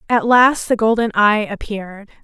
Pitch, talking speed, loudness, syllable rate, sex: 215 Hz, 160 wpm, -15 LUFS, 4.7 syllables/s, female